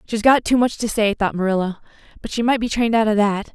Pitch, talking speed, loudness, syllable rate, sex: 220 Hz, 270 wpm, -19 LUFS, 6.5 syllables/s, female